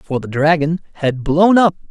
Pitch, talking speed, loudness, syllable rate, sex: 160 Hz, 190 wpm, -15 LUFS, 4.4 syllables/s, male